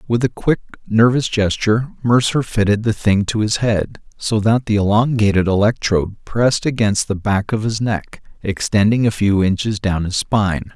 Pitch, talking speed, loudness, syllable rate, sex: 105 Hz, 175 wpm, -17 LUFS, 5.0 syllables/s, male